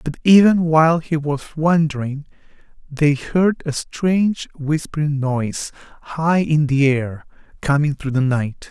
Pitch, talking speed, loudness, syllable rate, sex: 150 Hz, 140 wpm, -18 LUFS, 4.2 syllables/s, male